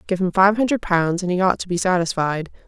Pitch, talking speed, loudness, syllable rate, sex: 185 Hz, 245 wpm, -19 LUFS, 5.8 syllables/s, female